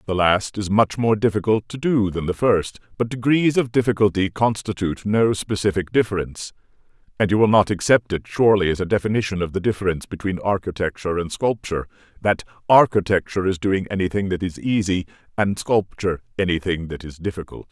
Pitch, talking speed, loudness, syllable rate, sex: 100 Hz, 170 wpm, -21 LUFS, 6.0 syllables/s, male